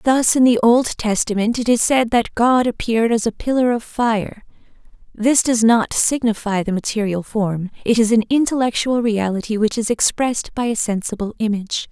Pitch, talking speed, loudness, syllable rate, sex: 225 Hz, 175 wpm, -18 LUFS, 5.1 syllables/s, female